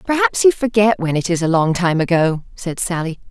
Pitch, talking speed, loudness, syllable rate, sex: 185 Hz, 220 wpm, -17 LUFS, 5.3 syllables/s, female